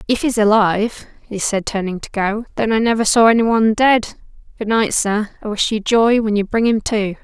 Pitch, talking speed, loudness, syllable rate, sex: 215 Hz, 225 wpm, -16 LUFS, 5.3 syllables/s, female